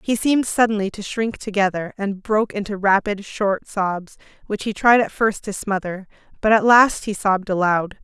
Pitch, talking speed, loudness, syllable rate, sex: 205 Hz, 185 wpm, -20 LUFS, 5.0 syllables/s, female